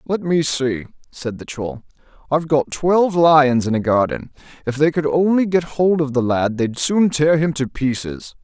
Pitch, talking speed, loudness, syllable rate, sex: 145 Hz, 200 wpm, -18 LUFS, 4.6 syllables/s, male